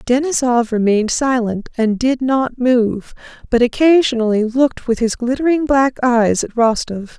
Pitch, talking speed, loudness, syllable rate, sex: 245 Hz, 140 wpm, -16 LUFS, 4.6 syllables/s, female